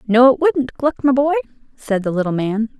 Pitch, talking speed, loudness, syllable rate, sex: 245 Hz, 215 wpm, -17 LUFS, 5.1 syllables/s, female